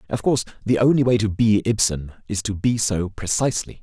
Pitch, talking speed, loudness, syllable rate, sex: 110 Hz, 205 wpm, -21 LUFS, 5.8 syllables/s, male